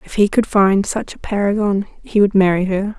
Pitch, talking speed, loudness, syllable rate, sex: 200 Hz, 220 wpm, -17 LUFS, 5.1 syllables/s, female